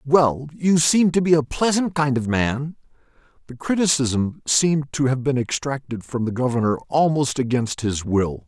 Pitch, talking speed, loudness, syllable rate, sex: 135 Hz, 170 wpm, -21 LUFS, 4.6 syllables/s, male